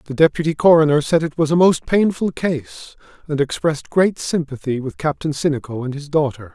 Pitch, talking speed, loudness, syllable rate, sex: 150 Hz, 185 wpm, -18 LUFS, 5.5 syllables/s, male